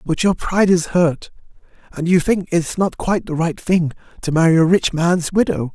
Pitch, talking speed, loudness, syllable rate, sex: 170 Hz, 210 wpm, -17 LUFS, 5.1 syllables/s, male